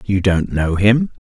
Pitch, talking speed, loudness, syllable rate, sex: 100 Hz, 190 wpm, -16 LUFS, 3.8 syllables/s, male